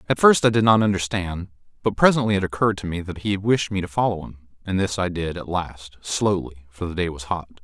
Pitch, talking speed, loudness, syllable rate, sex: 95 Hz, 235 wpm, -22 LUFS, 5.9 syllables/s, male